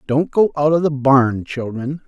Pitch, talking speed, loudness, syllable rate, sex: 140 Hz, 200 wpm, -17 LUFS, 4.3 syllables/s, male